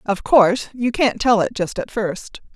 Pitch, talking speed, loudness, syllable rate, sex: 220 Hz, 210 wpm, -18 LUFS, 4.4 syllables/s, female